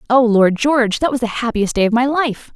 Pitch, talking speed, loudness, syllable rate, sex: 240 Hz, 260 wpm, -16 LUFS, 5.6 syllables/s, female